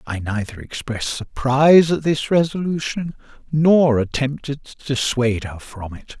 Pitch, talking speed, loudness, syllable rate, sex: 135 Hz, 135 wpm, -19 LUFS, 4.6 syllables/s, male